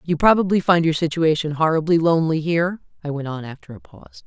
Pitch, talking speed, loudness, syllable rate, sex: 155 Hz, 195 wpm, -19 LUFS, 6.4 syllables/s, female